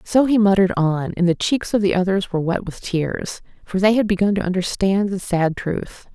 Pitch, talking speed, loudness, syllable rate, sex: 190 Hz, 225 wpm, -19 LUFS, 5.2 syllables/s, female